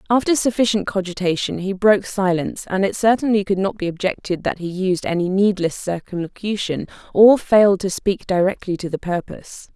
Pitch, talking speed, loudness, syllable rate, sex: 195 Hz, 165 wpm, -19 LUFS, 5.5 syllables/s, female